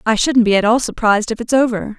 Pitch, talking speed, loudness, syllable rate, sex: 225 Hz, 270 wpm, -15 LUFS, 6.4 syllables/s, female